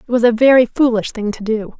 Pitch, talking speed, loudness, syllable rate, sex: 230 Hz, 265 wpm, -15 LUFS, 5.8 syllables/s, female